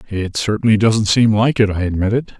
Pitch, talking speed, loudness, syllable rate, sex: 105 Hz, 200 wpm, -16 LUFS, 5.4 syllables/s, male